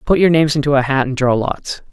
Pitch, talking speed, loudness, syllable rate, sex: 140 Hz, 280 wpm, -15 LUFS, 6.3 syllables/s, male